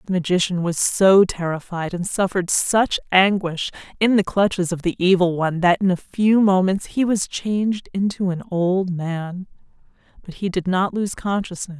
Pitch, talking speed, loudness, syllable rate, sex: 185 Hz, 175 wpm, -20 LUFS, 4.8 syllables/s, female